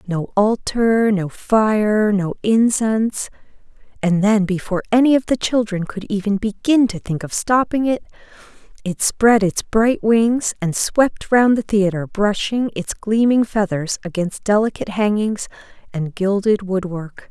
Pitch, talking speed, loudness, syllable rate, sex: 210 Hz, 140 wpm, -18 LUFS, 4.2 syllables/s, female